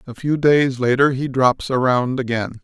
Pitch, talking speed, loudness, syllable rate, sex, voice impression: 130 Hz, 180 wpm, -18 LUFS, 4.6 syllables/s, male, masculine, very adult-like, slightly thick, cool, intellectual, slightly calm, elegant